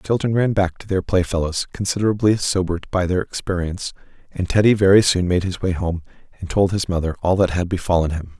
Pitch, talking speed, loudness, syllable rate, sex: 90 Hz, 205 wpm, -20 LUFS, 6.2 syllables/s, male